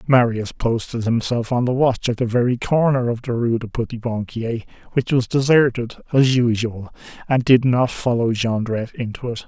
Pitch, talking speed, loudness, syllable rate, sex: 120 Hz, 175 wpm, -20 LUFS, 5.0 syllables/s, male